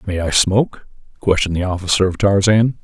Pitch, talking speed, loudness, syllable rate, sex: 100 Hz, 170 wpm, -16 LUFS, 6.0 syllables/s, male